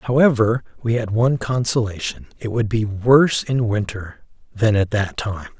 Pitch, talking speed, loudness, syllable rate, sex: 110 Hz, 150 wpm, -19 LUFS, 4.7 syllables/s, male